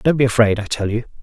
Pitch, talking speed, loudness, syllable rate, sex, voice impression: 115 Hz, 295 wpm, -18 LUFS, 7.2 syllables/s, male, very masculine, very adult-like, very middle-aged, very thick, slightly relaxed, slightly weak, slightly dark, slightly soft, slightly muffled, fluent, cool, very intellectual, slightly refreshing, sincere, calm, mature, friendly, very reassuring, unique, elegant, slightly wild, sweet, slightly lively, kind, slightly modest